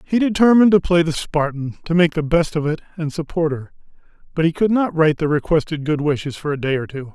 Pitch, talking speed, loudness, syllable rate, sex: 160 Hz, 245 wpm, -18 LUFS, 6.1 syllables/s, male